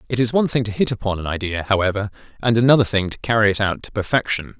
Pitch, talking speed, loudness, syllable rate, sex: 110 Hz, 250 wpm, -19 LUFS, 7.1 syllables/s, male